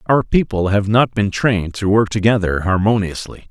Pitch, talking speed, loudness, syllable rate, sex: 105 Hz, 170 wpm, -16 LUFS, 5.1 syllables/s, male